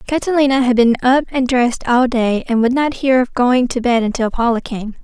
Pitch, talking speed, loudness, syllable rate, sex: 250 Hz, 225 wpm, -15 LUFS, 5.3 syllables/s, female